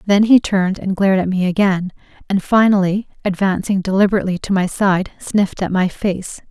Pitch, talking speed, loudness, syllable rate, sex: 190 Hz, 175 wpm, -17 LUFS, 5.6 syllables/s, female